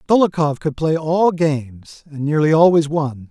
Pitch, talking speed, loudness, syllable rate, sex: 155 Hz, 165 wpm, -17 LUFS, 4.6 syllables/s, male